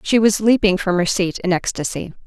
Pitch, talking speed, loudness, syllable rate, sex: 195 Hz, 210 wpm, -18 LUFS, 5.3 syllables/s, female